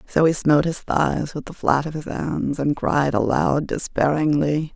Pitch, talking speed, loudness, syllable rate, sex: 145 Hz, 190 wpm, -21 LUFS, 4.5 syllables/s, female